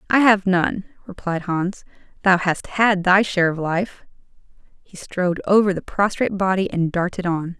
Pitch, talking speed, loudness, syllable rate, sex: 185 Hz, 165 wpm, -20 LUFS, 4.8 syllables/s, female